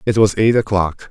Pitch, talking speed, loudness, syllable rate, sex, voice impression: 100 Hz, 215 wpm, -16 LUFS, 5.1 syllables/s, male, very masculine, very adult-like, slightly old, very thick, slightly relaxed, very powerful, bright, soft, slightly muffled, very fluent, slightly raspy, very cool, intellectual, slightly refreshing, sincere, very calm, very mature, very friendly, very reassuring, very unique, elegant, slightly wild, very sweet, lively, very kind, slightly modest